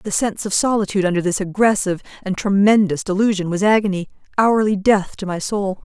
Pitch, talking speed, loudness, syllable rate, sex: 195 Hz, 175 wpm, -18 LUFS, 6.0 syllables/s, female